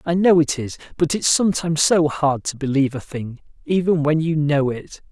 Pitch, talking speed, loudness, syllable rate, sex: 155 Hz, 210 wpm, -19 LUFS, 5.3 syllables/s, male